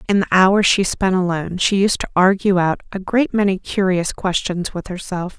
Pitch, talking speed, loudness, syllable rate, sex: 190 Hz, 200 wpm, -18 LUFS, 5.0 syllables/s, female